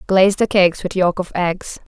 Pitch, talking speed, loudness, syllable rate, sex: 185 Hz, 215 wpm, -17 LUFS, 5.5 syllables/s, female